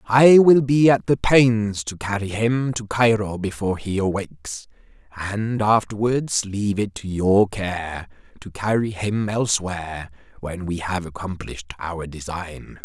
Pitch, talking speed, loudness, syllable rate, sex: 100 Hz, 145 wpm, -21 LUFS, 4.2 syllables/s, male